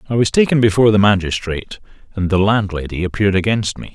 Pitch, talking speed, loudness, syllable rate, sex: 100 Hz, 185 wpm, -16 LUFS, 6.8 syllables/s, male